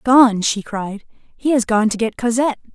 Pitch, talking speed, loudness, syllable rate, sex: 230 Hz, 195 wpm, -17 LUFS, 4.4 syllables/s, female